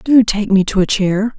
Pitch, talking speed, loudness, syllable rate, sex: 205 Hz, 260 wpm, -14 LUFS, 4.5 syllables/s, female